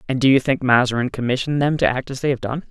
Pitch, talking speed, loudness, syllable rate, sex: 130 Hz, 290 wpm, -19 LUFS, 7.2 syllables/s, male